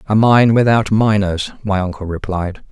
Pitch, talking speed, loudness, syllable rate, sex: 100 Hz, 155 wpm, -15 LUFS, 4.6 syllables/s, male